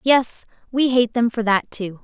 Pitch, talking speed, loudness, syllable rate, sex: 235 Hz, 205 wpm, -20 LUFS, 4.2 syllables/s, female